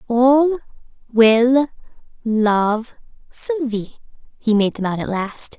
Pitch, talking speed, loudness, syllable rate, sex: 235 Hz, 75 wpm, -18 LUFS, 3.1 syllables/s, female